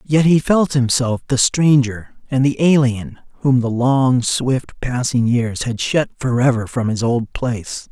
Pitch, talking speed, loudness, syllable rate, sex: 125 Hz, 165 wpm, -17 LUFS, 4.1 syllables/s, male